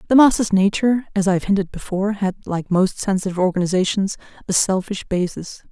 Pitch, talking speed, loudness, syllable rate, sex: 195 Hz, 170 wpm, -19 LUFS, 6.2 syllables/s, female